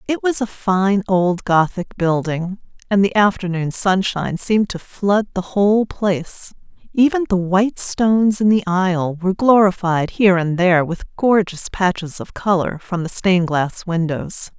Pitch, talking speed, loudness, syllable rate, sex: 190 Hz, 160 wpm, -18 LUFS, 4.6 syllables/s, female